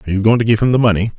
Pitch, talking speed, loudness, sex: 110 Hz, 405 wpm, -14 LUFS, male